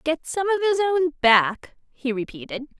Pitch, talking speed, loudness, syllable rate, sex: 295 Hz, 170 wpm, -22 LUFS, 5.5 syllables/s, female